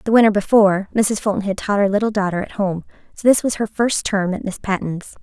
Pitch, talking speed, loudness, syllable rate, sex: 200 Hz, 240 wpm, -18 LUFS, 6.0 syllables/s, female